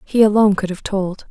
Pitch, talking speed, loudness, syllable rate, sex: 200 Hz, 230 wpm, -17 LUFS, 5.8 syllables/s, female